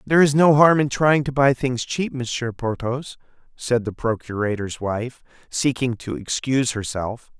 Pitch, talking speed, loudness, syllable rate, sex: 125 Hz, 160 wpm, -21 LUFS, 4.6 syllables/s, male